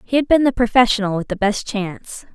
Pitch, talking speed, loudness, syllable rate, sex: 225 Hz, 230 wpm, -18 LUFS, 5.9 syllables/s, female